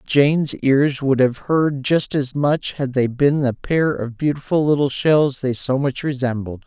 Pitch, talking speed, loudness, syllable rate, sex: 135 Hz, 200 wpm, -19 LUFS, 4.3 syllables/s, male